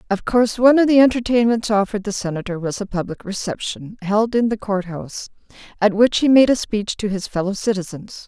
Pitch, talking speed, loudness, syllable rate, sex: 210 Hz, 205 wpm, -19 LUFS, 5.9 syllables/s, female